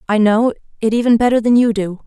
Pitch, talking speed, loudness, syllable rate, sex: 225 Hz, 230 wpm, -15 LUFS, 6.3 syllables/s, female